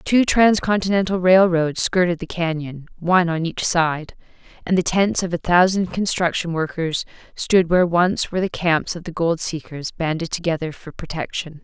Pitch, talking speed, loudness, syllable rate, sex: 170 Hz, 165 wpm, -20 LUFS, 4.9 syllables/s, female